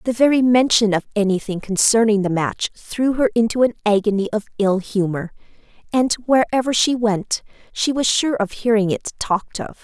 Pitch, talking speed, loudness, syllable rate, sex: 220 Hz, 170 wpm, -18 LUFS, 5.1 syllables/s, female